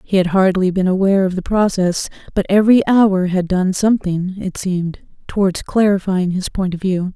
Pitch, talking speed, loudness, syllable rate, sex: 190 Hz, 185 wpm, -16 LUFS, 5.3 syllables/s, female